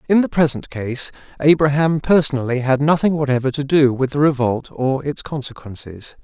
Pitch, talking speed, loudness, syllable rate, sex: 140 Hz, 165 wpm, -18 LUFS, 5.2 syllables/s, male